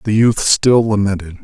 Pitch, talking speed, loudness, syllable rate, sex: 105 Hz, 165 wpm, -14 LUFS, 4.6 syllables/s, male